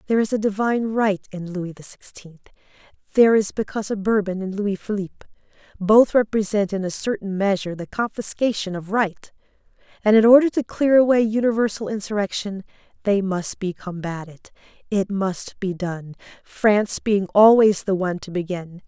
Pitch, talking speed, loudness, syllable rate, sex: 200 Hz, 160 wpm, -21 LUFS, 5.3 syllables/s, female